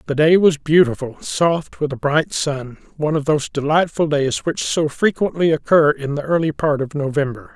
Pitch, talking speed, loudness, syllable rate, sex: 150 Hz, 190 wpm, -18 LUFS, 5.1 syllables/s, male